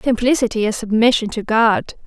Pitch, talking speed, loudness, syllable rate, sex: 225 Hz, 145 wpm, -17 LUFS, 5.2 syllables/s, female